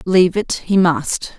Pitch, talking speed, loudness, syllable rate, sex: 175 Hz, 175 wpm, -16 LUFS, 4.1 syllables/s, female